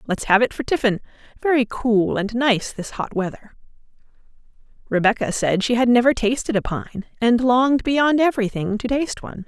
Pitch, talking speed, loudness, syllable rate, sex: 230 Hz, 170 wpm, -20 LUFS, 5.4 syllables/s, female